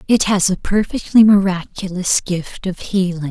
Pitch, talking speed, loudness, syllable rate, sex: 190 Hz, 145 wpm, -16 LUFS, 4.4 syllables/s, female